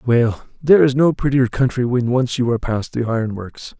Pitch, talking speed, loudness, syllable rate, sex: 125 Hz, 220 wpm, -18 LUFS, 5.4 syllables/s, male